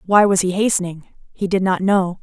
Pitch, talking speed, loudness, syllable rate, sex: 190 Hz, 215 wpm, -18 LUFS, 5.5 syllables/s, female